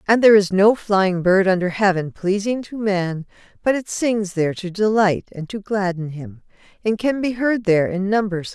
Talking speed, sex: 220 wpm, female